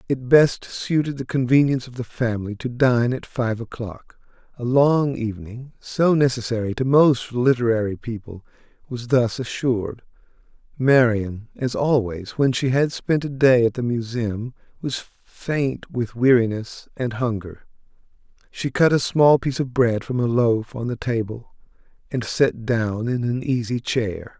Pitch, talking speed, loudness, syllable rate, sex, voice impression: 120 Hz, 155 wpm, -21 LUFS, 4.4 syllables/s, male, masculine, adult-like, very middle-aged, relaxed, weak, slightly dark, hard, slightly muffled, raspy, cool, intellectual, slightly sincere, slightly calm, very mature, slightly friendly, slightly reassuring, wild, slightly sweet, slightly lively, slightly kind, slightly intense